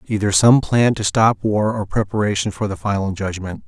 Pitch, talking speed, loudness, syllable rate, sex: 105 Hz, 195 wpm, -18 LUFS, 5.1 syllables/s, male